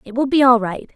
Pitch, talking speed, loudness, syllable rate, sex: 245 Hz, 315 wpm, -15 LUFS, 5.9 syllables/s, female